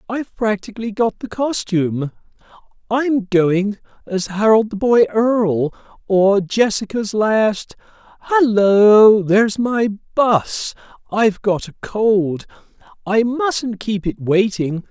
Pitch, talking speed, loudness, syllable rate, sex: 210 Hz, 110 wpm, -17 LUFS, 3.5 syllables/s, male